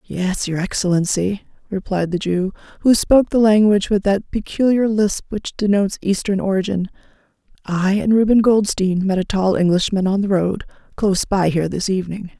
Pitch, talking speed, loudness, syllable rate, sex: 195 Hz, 165 wpm, -18 LUFS, 5.3 syllables/s, female